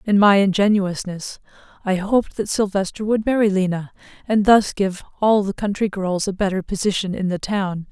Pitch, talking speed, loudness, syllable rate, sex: 200 Hz, 175 wpm, -20 LUFS, 5.1 syllables/s, female